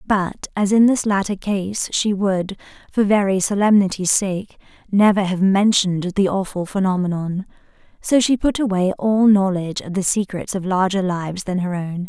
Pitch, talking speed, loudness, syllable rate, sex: 195 Hz, 165 wpm, -19 LUFS, 4.4 syllables/s, female